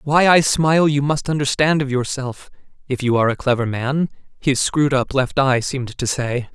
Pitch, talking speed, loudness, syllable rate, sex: 135 Hz, 200 wpm, -18 LUFS, 5.2 syllables/s, male